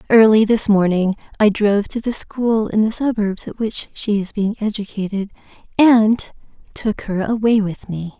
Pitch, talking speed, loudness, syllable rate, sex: 210 Hz, 170 wpm, -18 LUFS, 4.5 syllables/s, female